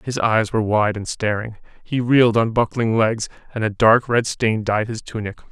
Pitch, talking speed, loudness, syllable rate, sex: 110 Hz, 205 wpm, -19 LUFS, 5.0 syllables/s, male